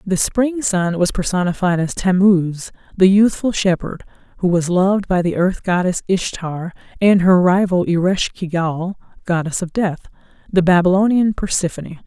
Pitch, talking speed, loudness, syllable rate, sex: 185 Hz, 150 wpm, -17 LUFS, 4.6 syllables/s, female